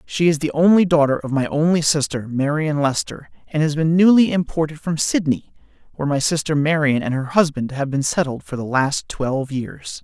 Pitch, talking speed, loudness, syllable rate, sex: 150 Hz, 195 wpm, -19 LUFS, 5.3 syllables/s, male